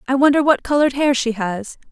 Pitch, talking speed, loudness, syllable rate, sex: 260 Hz, 220 wpm, -17 LUFS, 6.1 syllables/s, female